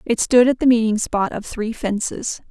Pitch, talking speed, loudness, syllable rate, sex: 225 Hz, 215 wpm, -19 LUFS, 4.7 syllables/s, female